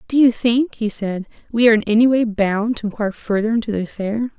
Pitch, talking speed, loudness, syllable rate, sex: 220 Hz, 235 wpm, -18 LUFS, 6.1 syllables/s, female